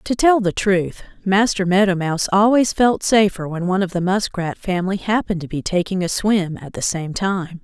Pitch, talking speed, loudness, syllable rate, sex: 190 Hz, 205 wpm, -19 LUFS, 5.2 syllables/s, female